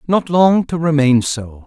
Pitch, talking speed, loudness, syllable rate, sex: 145 Hz, 180 wpm, -15 LUFS, 4.0 syllables/s, male